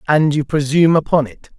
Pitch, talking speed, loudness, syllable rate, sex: 150 Hz, 190 wpm, -15 LUFS, 5.7 syllables/s, male